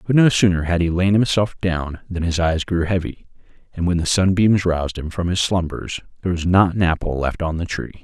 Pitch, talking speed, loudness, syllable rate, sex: 90 Hz, 230 wpm, -19 LUFS, 5.5 syllables/s, male